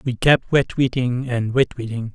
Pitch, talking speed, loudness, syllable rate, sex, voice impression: 125 Hz, 140 wpm, -20 LUFS, 4.4 syllables/s, male, masculine, middle-aged, slightly relaxed, slightly soft, slightly muffled, raspy, sincere, mature, friendly, reassuring, wild, kind, modest